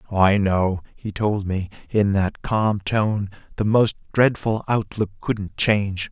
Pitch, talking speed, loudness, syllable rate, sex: 100 Hz, 145 wpm, -21 LUFS, 3.6 syllables/s, male